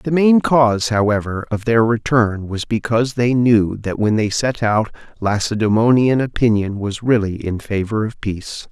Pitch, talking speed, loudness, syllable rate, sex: 110 Hz, 165 wpm, -17 LUFS, 4.7 syllables/s, male